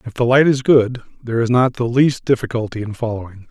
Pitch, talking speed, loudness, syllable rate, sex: 120 Hz, 225 wpm, -17 LUFS, 6.0 syllables/s, male